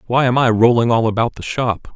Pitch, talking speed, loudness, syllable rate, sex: 120 Hz, 245 wpm, -16 LUFS, 5.7 syllables/s, male